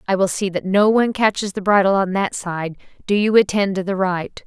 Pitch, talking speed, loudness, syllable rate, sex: 195 Hz, 240 wpm, -18 LUFS, 5.5 syllables/s, female